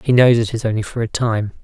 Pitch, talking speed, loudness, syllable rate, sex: 115 Hz, 295 wpm, -17 LUFS, 5.9 syllables/s, male